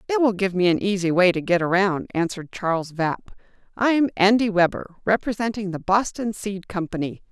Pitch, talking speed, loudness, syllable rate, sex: 195 Hz, 170 wpm, -22 LUFS, 5.3 syllables/s, female